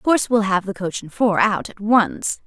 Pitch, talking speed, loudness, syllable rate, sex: 205 Hz, 265 wpm, -19 LUFS, 5.0 syllables/s, female